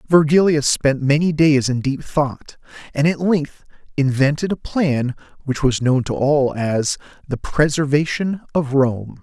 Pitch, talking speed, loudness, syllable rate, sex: 145 Hz, 150 wpm, -18 LUFS, 4.0 syllables/s, male